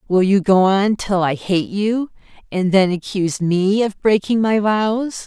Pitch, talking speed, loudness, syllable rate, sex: 200 Hz, 180 wpm, -17 LUFS, 4.0 syllables/s, female